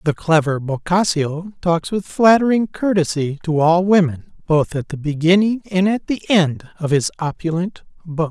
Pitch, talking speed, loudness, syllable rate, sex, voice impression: 170 Hz, 160 wpm, -18 LUFS, 4.6 syllables/s, male, very masculine, slightly old, very thick, tensed, powerful, slightly dark, soft, slightly muffled, fluent, raspy, slightly cool, intellectual, slightly refreshing, sincere, very calm, very mature, slightly friendly, reassuring, very unique, slightly elegant, wild, slightly sweet, lively, kind, slightly intense, modest